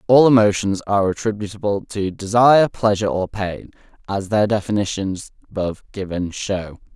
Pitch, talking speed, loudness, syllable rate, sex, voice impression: 100 Hz, 130 wpm, -19 LUFS, 5.4 syllables/s, male, very masculine, very adult-like, slightly old, very thick, slightly tensed, weak, slightly dark, hard, slightly muffled, slightly halting, slightly raspy, cool, intellectual, very sincere, very calm, very mature, slightly friendly, reassuring, unique, wild, slightly sweet, slightly lively, kind, slightly modest